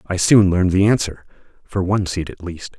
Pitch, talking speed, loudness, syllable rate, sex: 90 Hz, 195 wpm, -18 LUFS, 5.7 syllables/s, male